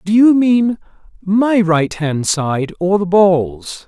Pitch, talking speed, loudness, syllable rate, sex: 185 Hz, 140 wpm, -14 LUFS, 3.0 syllables/s, male